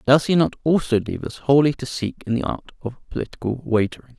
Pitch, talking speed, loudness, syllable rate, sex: 130 Hz, 215 wpm, -21 LUFS, 6.1 syllables/s, male